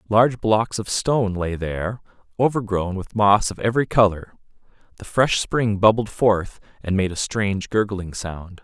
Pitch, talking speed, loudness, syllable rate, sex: 105 Hz, 160 wpm, -21 LUFS, 4.7 syllables/s, male